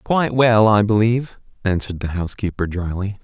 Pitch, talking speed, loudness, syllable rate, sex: 105 Hz, 150 wpm, -19 LUFS, 5.8 syllables/s, male